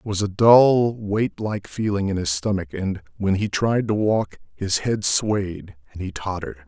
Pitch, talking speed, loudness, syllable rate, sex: 100 Hz, 200 wpm, -21 LUFS, 4.6 syllables/s, male